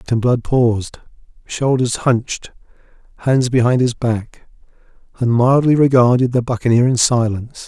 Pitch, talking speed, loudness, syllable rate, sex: 120 Hz, 125 wpm, -16 LUFS, 4.8 syllables/s, male